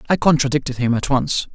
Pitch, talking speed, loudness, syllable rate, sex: 135 Hz, 195 wpm, -18 LUFS, 6.0 syllables/s, male